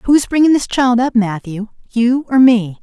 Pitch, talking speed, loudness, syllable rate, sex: 240 Hz, 190 wpm, -14 LUFS, 4.3 syllables/s, female